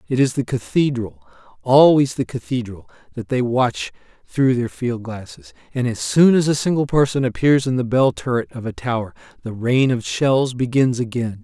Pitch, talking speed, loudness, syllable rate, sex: 125 Hz, 185 wpm, -19 LUFS, 4.9 syllables/s, male